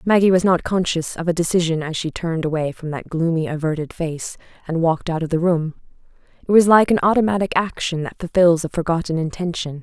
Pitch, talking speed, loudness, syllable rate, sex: 170 Hz, 200 wpm, -19 LUFS, 6.0 syllables/s, female